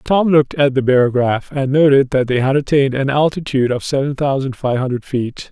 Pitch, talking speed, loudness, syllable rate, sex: 135 Hz, 205 wpm, -16 LUFS, 5.7 syllables/s, male